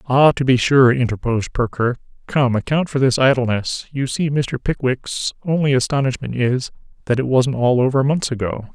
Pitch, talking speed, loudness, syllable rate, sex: 130 Hz, 170 wpm, -18 LUFS, 5.1 syllables/s, male